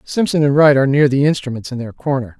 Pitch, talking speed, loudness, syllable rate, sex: 140 Hz, 250 wpm, -15 LUFS, 6.6 syllables/s, male